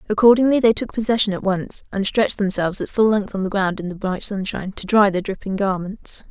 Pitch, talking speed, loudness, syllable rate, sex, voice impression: 200 Hz, 230 wpm, -20 LUFS, 6.0 syllables/s, female, feminine, slightly adult-like, slightly fluent, slightly refreshing, sincere